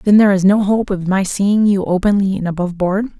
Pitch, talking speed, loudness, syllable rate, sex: 195 Hz, 245 wpm, -15 LUFS, 6.1 syllables/s, female